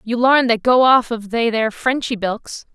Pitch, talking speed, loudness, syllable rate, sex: 235 Hz, 220 wpm, -16 LUFS, 4.6 syllables/s, female